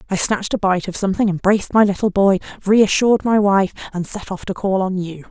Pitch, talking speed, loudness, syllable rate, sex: 195 Hz, 225 wpm, -17 LUFS, 6.1 syllables/s, female